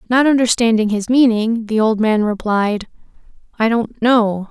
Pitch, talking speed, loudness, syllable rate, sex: 225 Hz, 145 wpm, -16 LUFS, 4.4 syllables/s, female